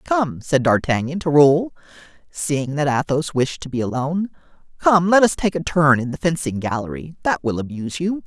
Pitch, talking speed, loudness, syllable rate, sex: 150 Hz, 190 wpm, -19 LUFS, 5.1 syllables/s, male